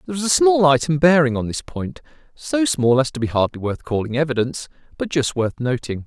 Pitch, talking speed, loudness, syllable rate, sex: 145 Hz, 220 wpm, -19 LUFS, 5.8 syllables/s, male